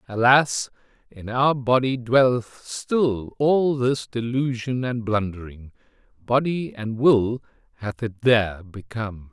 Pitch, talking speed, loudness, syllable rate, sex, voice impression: 120 Hz, 115 wpm, -22 LUFS, 3.8 syllables/s, male, masculine, adult-like, tensed, powerful, slightly bright, clear, slightly halting, slightly mature, friendly, wild, lively, intense